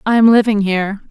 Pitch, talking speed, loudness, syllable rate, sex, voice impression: 210 Hz, 165 wpm, -13 LUFS, 5.4 syllables/s, female, very feminine, slightly young, slightly adult-like, very thin, tensed, powerful, bright, hard, clear, fluent, very cute, intellectual, very refreshing, sincere, calm, very friendly, very reassuring, very unique, very elegant, very sweet, very kind, very modest, light